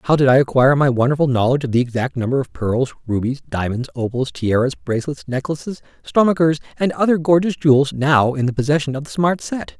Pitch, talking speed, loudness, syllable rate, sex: 140 Hz, 195 wpm, -18 LUFS, 6.0 syllables/s, male